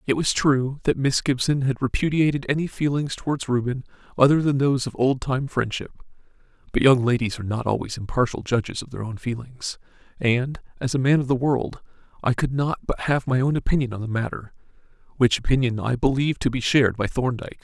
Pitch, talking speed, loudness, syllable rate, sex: 130 Hz, 195 wpm, -23 LUFS, 5.9 syllables/s, male